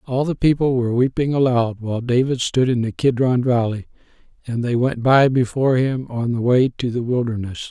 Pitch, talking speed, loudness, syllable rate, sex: 125 Hz, 195 wpm, -19 LUFS, 5.4 syllables/s, male